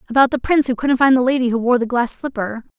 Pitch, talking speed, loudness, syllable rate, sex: 250 Hz, 280 wpm, -17 LUFS, 6.8 syllables/s, female